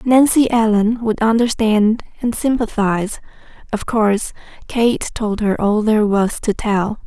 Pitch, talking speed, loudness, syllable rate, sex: 220 Hz, 135 wpm, -17 LUFS, 4.3 syllables/s, female